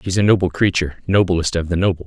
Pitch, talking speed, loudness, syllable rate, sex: 90 Hz, 230 wpm, -18 LUFS, 6.7 syllables/s, male